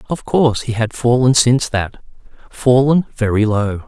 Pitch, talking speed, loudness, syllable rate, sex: 120 Hz, 140 wpm, -15 LUFS, 4.9 syllables/s, male